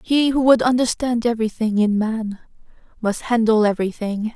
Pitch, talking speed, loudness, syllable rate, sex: 225 Hz, 140 wpm, -19 LUFS, 5.1 syllables/s, female